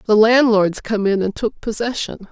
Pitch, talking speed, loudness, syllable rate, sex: 215 Hz, 180 wpm, -17 LUFS, 4.7 syllables/s, female